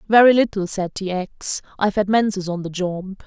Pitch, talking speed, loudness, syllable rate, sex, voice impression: 195 Hz, 200 wpm, -20 LUFS, 5.1 syllables/s, female, feminine, slightly gender-neutral, very adult-like, middle-aged, slightly thin, slightly tensed, slightly powerful, bright, hard, clear, fluent, cool, intellectual, very refreshing, sincere, calm, friendly, reassuring, very unique, slightly elegant, wild, slightly sweet, lively, slightly strict, slightly intense, sharp, slightly modest, light